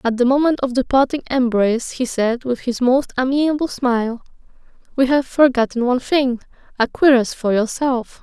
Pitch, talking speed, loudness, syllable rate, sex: 255 Hz, 170 wpm, -18 LUFS, 5.1 syllables/s, female